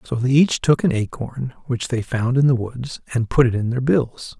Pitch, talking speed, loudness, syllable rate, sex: 125 Hz, 245 wpm, -20 LUFS, 4.8 syllables/s, male